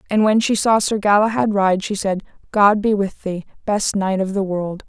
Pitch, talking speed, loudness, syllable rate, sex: 200 Hz, 220 wpm, -18 LUFS, 4.8 syllables/s, female